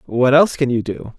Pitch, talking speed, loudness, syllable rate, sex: 130 Hz, 255 wpm, -16 LUFS, 5.8 syllables/s, male